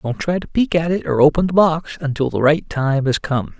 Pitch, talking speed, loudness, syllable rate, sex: 155 Hz, 265 wpm, -18 LUFS, 5.1 syllables/s, male